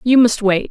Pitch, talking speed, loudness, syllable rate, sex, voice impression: 225 Hz, 255 wpm, -14 LUFS, 4.9 syllables/s, female, feminine, adult-like, calm, slightly unique